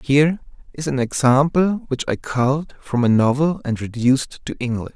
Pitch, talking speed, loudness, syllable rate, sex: 135 Hz, 170 wpm, -19 LUFS, 5.1 syllables/s, male